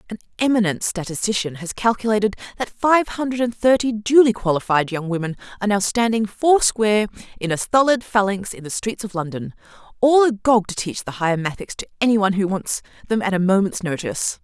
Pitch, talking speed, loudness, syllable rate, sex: 205 Hz, 185 wpm, -20 LUFS, 6.0 syllables/s, female